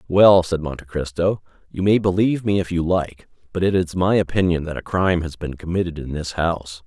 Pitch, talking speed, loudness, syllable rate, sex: 85 Hz, 220 wpm, -20 LUFS, 5.7 syllables/s, male